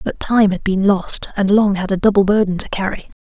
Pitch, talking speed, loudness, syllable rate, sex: 200 Hz, 240 wpm, -16 LUFS, 5.4 syllables/s, female